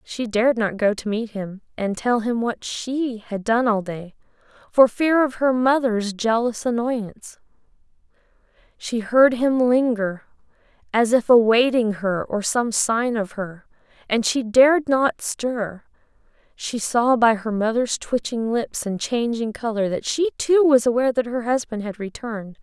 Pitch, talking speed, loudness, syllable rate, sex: 230 Hz, 160 wpm, -21 LUFS, 4.3 syllables/s, female